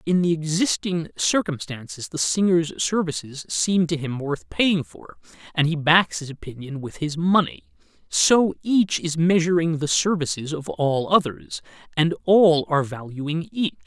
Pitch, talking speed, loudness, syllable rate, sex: 155 Hz, 150 wpm, -22 LUFS, 4.3 syllables/s, male